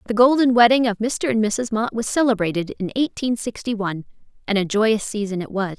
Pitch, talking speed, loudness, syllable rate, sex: 220 Hz, 210 wpm, -20 LUFS, 5.6 syllables/s, female